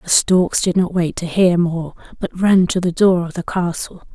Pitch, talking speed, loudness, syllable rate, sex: 175 Hz, 230 wpm, -17 LUFS, 4.5 syllables/s, female